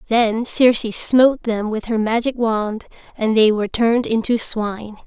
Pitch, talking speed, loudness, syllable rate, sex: 225 Hz, 165 wpm, -18 LUFS, 4.7 syllables/s, female